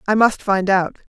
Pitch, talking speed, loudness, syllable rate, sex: 200 Hz, 210 wpm, -17 LUFS, 4.7 syllables/s, female